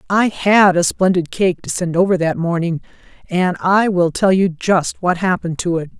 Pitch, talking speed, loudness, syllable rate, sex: 180 Hz, 200 wpm, -16 LUFS, 4.8 syllables/s, female